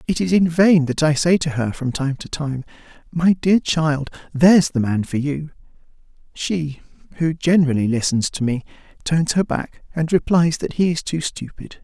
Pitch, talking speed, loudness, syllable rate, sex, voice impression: 155 Hz, 190 wpm, -19 LUFS, 4.8 syllables/s, male, masculine, adult-like, slightly tensed, slightly powerful, clear, slightly raspy, friendly, reassuring, wild, kind, slightly modest